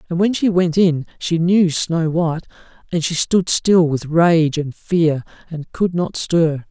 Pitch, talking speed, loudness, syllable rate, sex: 165 Hz, 190 wpm, -17 LUFS, 3.9 syllables/s, male